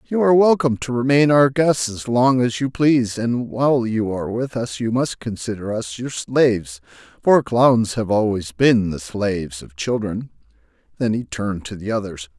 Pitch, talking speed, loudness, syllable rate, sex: 115 Hz, 190 wpm, -19 LUFS, 4.9 syllables/s, male